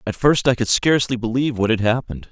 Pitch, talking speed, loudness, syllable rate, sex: 120 Hz, 235 wpm, -19 LUFS, 6.9 syllables/s, male